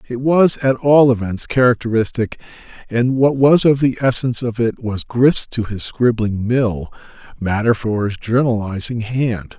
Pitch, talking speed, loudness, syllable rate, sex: 120 Hz, 155 wpm, -17 LUFS, 4.4 syllables/s, male